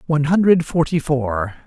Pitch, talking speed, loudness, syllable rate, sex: 150 Hz, 145 wpm, -18 LUFS, 4.9 syllables/s, male